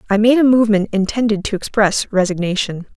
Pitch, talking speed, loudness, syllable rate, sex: 210 Hz, 160 wpm, -16 LUFS, 6.0 syllables/s, female